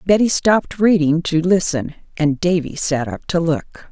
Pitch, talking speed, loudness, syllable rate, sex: 165 Hz, 170 wpm, -17 LUFS, 4.8 syllables/s, female